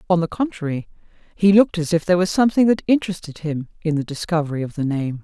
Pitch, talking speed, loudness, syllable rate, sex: 170 Hz, 220 wpm, -20 LUFS, 7.1 syllables/s, female